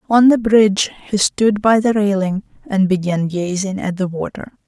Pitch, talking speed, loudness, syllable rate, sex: 200 Hz, 180 wpm, -16 LUFS, 4.8 syllables/s, female